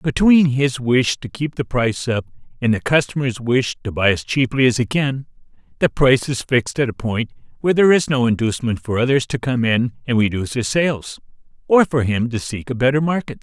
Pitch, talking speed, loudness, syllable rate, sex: 130 Hz, 215 wpm, -18 LUFS, 5.6 syllables/s, male